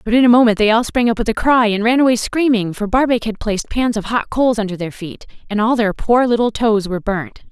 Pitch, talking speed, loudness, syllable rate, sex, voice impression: 225 Hz, 270 wpm, -16 LUFS, 6.1 syllables/s, female, very feminine, very adult-like, very thin, slightly tensed, powerful, very bright, slightly hard, very clear, very fluent, slightly raspy, cool, very intellectual, refreshing, sincere, slightly calm, friendly, very reassuring, unique, slightly elegant, wild, sweet, very lively, strict, intense, slightly sharp, light